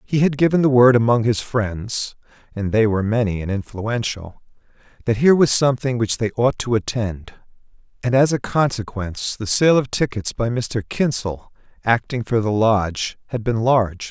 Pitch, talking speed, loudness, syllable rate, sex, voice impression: 115 Hz, 165 wpm, -19 LUFS, 5.0 syllables/s, male, very masculine, very adult-like, thick, tensed, powerful, bright, soft, clear, fluent, slightly raspy, cool, very intellectual, refreshing, sincere, very calm, mature, friendly, very reassuring, unique, elegant, slightly wild, sweet, lively, kind, slightly modest